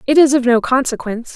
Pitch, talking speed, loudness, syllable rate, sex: 255 Hz, 220 wpm, -15 LUFS, 6.6 syllables/s, female